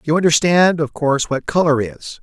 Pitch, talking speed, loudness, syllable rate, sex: 155 Hz, 190 wpm, -16 LUFS, 5.2 syllables/s, male